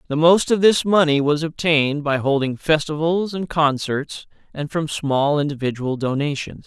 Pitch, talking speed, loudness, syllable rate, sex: 150 Hz, 155 wpm, -19 LUFS, 4.7 syllables/s, male